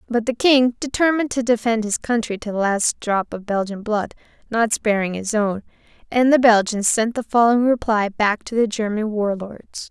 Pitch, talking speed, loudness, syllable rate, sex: 220 Hz, 195 wpm, -19 LUFS, 4.9 syllables/s, female